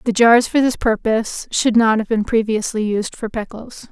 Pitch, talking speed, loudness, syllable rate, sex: 225 Hz, 200 wpm, -17 LUFS, 4.8 syllables/s, female